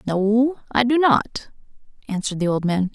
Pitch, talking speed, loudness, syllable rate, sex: 220 Hz, 165 wpm, -20 LUFS, 4.8 syllables/s, female